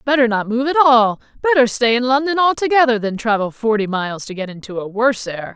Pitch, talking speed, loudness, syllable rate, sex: 240 Hz, 215 wpm, -17 LUFS, 5.9 syllables/s, female